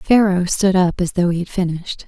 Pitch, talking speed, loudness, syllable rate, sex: 185 Hz, 230 wpm, -17 LUFS, 5.4 syllables/s, female